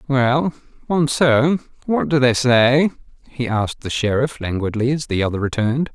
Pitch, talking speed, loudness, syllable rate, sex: 130 Hz, 150 wpm, -18 LUFS, 4.7 syllables/s, male